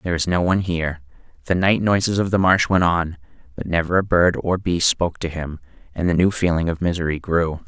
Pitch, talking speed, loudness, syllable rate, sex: 85 Hz, 225 wpm, -20 LUFS, 6.0 syllables/s, male